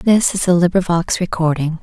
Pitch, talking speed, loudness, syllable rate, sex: 175 Hz, 165 wpm, -16 LUFS, 5.1 syllables/s, female